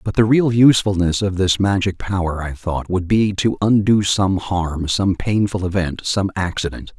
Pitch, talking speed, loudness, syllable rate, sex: 95 Hz, 180 wpm, -18 LUFS, 4.6 syllables/s, male